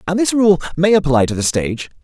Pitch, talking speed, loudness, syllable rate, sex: 165 Hz, 235 wpm, -15 LUFS, 6.3 syllables/s, male